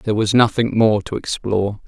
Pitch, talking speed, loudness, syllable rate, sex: 105 Hz, 190 wpm, -18 LUFS, 5.5 syllables/s, male